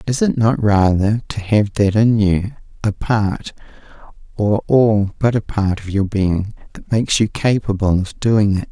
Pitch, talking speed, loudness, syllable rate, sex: 105 Hz, 180 wpm, -17 LUFS, 4.2 syllables/s, male